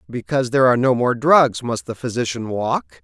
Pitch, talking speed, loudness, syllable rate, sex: 120 Hz, 195 wpm, -18 LUFS, 5.6 syllables/s, male